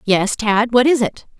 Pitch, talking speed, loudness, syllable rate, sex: 225 Hz, 215 wpm, -16 LUFS, 4.2 syllables/s, female